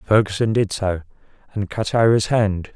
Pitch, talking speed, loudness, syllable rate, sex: 100 Hz, 150 wpm, -20 LUFS, 4.6 syllables/s, male